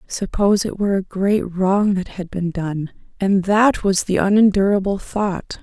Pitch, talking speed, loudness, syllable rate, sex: 195 Hz, 170 wpm, -19 LUFS, 4.4 syllables/s, female